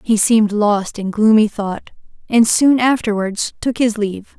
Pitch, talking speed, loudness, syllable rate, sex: 215 Hz, 165 wpm, -16 LUFS, 4.4 syllables/s, female